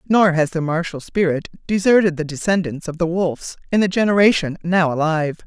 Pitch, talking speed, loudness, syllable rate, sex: 170 Hz, 175 wpm, -18 LUFS, 5.8 syllables/s, female